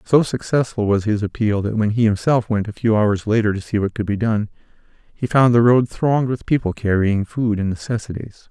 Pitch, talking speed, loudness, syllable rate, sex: 110 Hz, 220 wpm, -19 LUFS, 5.4 syllables/s, male